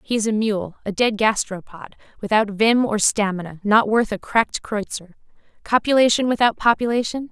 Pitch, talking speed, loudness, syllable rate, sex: 215 Hz, 155 wpm, -19 LUFS, 5.4 syllables/s, female